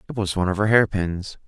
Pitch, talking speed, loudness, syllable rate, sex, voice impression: 100 Hz, 245 wpm, -21 LUFS, 6.6 syllables/s, male, masculine, adult-like, clear, halting, slightly intellectual, friendly, unique, slightly wild, slightly kind